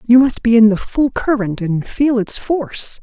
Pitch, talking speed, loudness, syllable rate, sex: 235 Hz, 220 wpm, -15 LUFS, 4.5 syllables/s, female